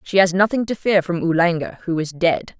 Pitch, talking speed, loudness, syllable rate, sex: 175 Hz, 230 wpm, -19 LUFS, 5.4 syllables/s, female